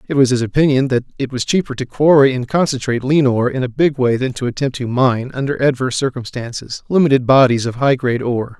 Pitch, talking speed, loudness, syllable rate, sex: 130 Hz, 225 wpm, -16 LUFS, 6.4 syllables/s, male